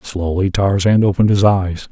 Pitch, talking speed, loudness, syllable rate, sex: 95 Hz, 155 wpm, -15 LUFS, 5.0 syllables/s, male